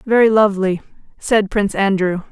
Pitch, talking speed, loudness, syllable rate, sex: 200 Hz, 130 wpm, -16 LUFS, 5.7 syllables/s, female